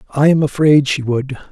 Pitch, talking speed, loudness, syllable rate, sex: 140 Hz, 160 wpm, -14 LUFS, 4.2 syllables/s, male